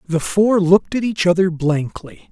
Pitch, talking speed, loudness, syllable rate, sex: 175 Hz, 180 wpm, -17 LUFS, 4.6 syllables/s, male